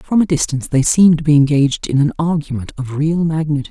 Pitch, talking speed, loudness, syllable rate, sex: 150 Hz, 225 wpm, -15 LUFS, 6.8 syllables/s, female